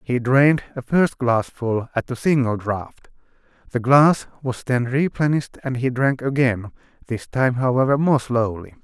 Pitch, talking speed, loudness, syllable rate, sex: 130 Hz, 155 wpm, -20 LUFS, 4.5 syllables/s, male